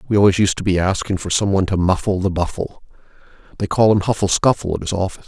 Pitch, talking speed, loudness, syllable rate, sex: 95 Hz, 240 wpm, -18 LUFS, 6.9 syllables/s, male